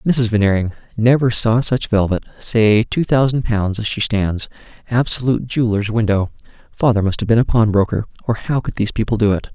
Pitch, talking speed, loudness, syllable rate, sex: 110 Hz, 180 wpm, -17 LUFS, 5.6 syllables/s, male